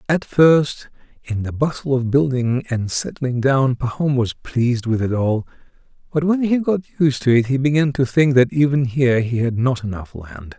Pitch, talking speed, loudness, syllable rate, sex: 130 Hz, 200 wpm, -18 LUFS, 4.8 syllables/s, male